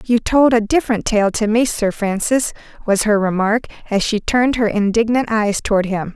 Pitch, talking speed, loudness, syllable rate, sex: 220 Hz, 195 wpm, -17 LUFS, 5.2 syllables/s, female